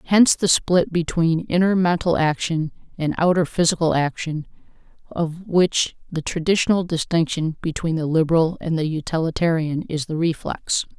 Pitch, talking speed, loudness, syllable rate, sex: 165 Hz, 135 wpm, -21 LUFS, 4.9 syllables/s, female